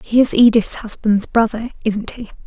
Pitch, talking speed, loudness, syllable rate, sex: 225 Hz, 170 wpm, -16 LUFS, 4.8 syllables/s, female